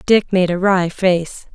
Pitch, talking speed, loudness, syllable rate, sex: 185 Hz, 195 wpm, -16 LUFS, 3.6 syllables/s, female